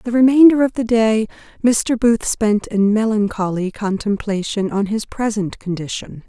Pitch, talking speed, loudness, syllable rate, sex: 215 Hz, 145 wpm, -17 LUFS, 4.4 syllables/s, female